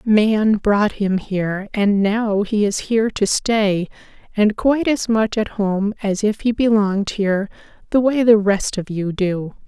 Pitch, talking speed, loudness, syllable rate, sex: 210 Hz, 180 wpm, -18 LUFS, 4.2 syllables/s, female